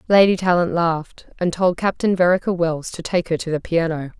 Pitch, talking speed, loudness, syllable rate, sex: 175 Hz, 200 wpm, -19 LUFS, 5.5 syllables/s, female